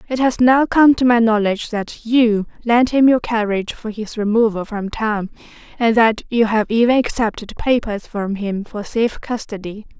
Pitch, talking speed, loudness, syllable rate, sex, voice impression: 225 Hz, 180 wpm, -17 LUFS, 4.8 syllables/s, female, feminine, slightly young, tensed, powerful, bright, soft, slightly raspy, friendly, lively, kind, light